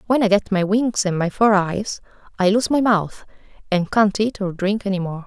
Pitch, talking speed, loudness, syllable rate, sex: 200 Hz, 230 wpm, -19 LUFS, 4.9 syllables/s, female